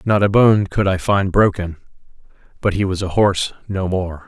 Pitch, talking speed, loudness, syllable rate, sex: 95 Hz, 195 wpm, -17 LUFS, 5.0 syllables/s, male